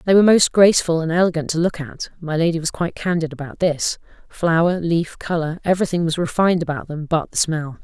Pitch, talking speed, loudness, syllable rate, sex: 165 Hz, 200 wpm, -19 LUFS, 5.0 syllables/s, female